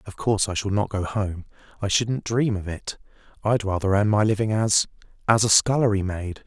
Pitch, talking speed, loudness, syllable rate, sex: 105 Hz, 195 wpm, -23 LUFS, 5.3 syllables/s, male